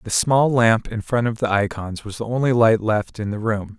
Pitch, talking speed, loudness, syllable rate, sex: 110 Hz, 255 wpm, -20 LUFS, 4.9 syllables/s, male